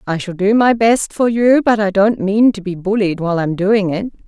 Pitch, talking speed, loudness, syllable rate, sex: 205 Hz, 255 wpm, -15 LUFS, 5.1 syllables/s, female